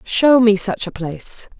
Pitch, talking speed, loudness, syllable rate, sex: 205 Hz, 190 wpm, -16 LUFS, 4.2 syllables/s, female